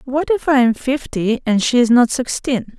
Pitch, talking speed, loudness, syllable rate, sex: 250 Hz, 215 wpm, -16 LUFS, 4.6 syllables/s, female